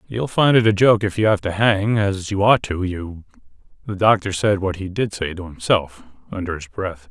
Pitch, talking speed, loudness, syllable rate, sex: 100 Hz, 230 wpm, -19 LUFS, 4.5 syllables/s, male